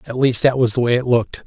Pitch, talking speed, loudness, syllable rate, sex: 125 Hz, 325 wpm, -17 LUFS, 6.6 syllables/s, male